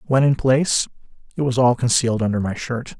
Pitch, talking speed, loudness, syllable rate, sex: 125 Hz, 200 wpm, -19 LUFS, 6.0 syllables/s, male